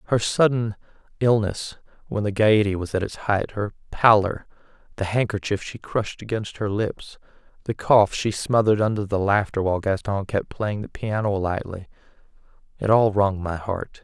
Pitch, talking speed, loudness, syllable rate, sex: 105 Hz, 160 wpm, -23 LUFS, 5.0 syllables/s, male